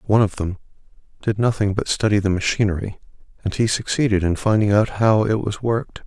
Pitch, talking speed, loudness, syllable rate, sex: 105 Hz, 190 wpm, -20 LUFS, 5.9 syllables/s, male